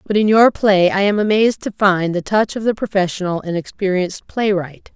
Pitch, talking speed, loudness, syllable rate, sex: 195 Hz, 205 wpm, -17 LUFS, 5.4 syllables/s, female